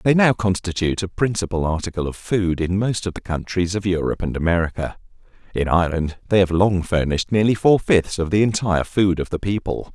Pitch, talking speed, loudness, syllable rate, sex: 95 Hz, 200 wpm, -20 LUFS, 5.9 syllables/s, male